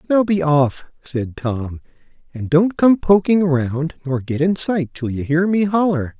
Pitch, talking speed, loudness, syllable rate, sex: 160 Hz, 185 wpm, -18 LUFS, 4.3 syllables/s, male